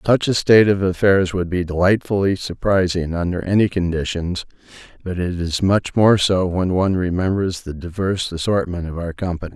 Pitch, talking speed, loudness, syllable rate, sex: 90 Hz, 170 wpm, -19 LUFS, 5.3 syllables/s, male